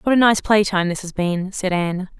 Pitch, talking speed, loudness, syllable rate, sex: 190 Hz, 275 wpm, -19 LUFS, 5.4 syllables/s, female